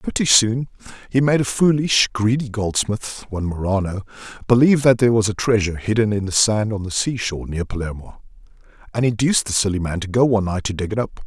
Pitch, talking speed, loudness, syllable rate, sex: 110 Hz, 210 wpm, -19 LUFS, 6.2 syllables/s, male